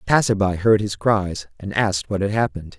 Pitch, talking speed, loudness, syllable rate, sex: 100 Hz, 215 wpm, -20 LUFS, 5.7 syllables/s, male